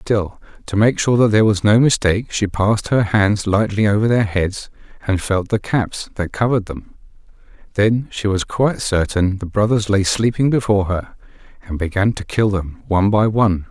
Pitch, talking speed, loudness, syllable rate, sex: 105 Hz, 190 wpm, -17 LUFS, 5.2 syllables/s, male